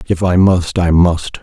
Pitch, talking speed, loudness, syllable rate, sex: 90 Hz, 210 wpm, -13 LUFS, 3.9 syllables/s, male